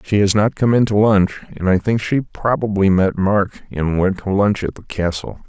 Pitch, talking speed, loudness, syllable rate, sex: 100 Hz, 230 wpm, -17 LUFS, 4.7 syllables/s, male